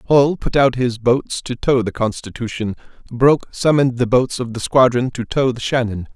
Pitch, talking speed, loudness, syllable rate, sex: 125 Hz, 195 wpm, -18 LUFS, 5.1 syllables/s, male